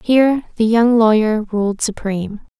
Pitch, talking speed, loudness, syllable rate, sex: 220 Hz, 140 wpm, -16 LUFS, 4.7 syllables/s, female